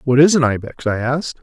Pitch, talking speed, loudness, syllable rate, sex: 135 Hz, 250 wpm, -16 LUFS, 6.3 syllables/s, male